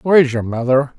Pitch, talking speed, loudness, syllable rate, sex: 135 Hz, 245 wpm, -16 LUFS, 6.5 syllables/s, male